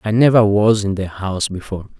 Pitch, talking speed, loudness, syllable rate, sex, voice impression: 100 Hz, 210 wpm, -16 LUFS, 6.0 syllables/s, male, masculine, adult-like, slightly middle-aged, thick, relaxed, weak, very dark, soft, muffled, slightly halting, slightly raspy, slightly cool, slightly intellectual, sincere, slightly calm, mature, slightly friendly, slightly reassuring, very unique, wild, slightly sweet, kind, very modest